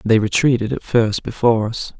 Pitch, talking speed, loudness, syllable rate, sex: 115 Hz, 180 wpm, -18 LUFS, 5.4 syllables/s, male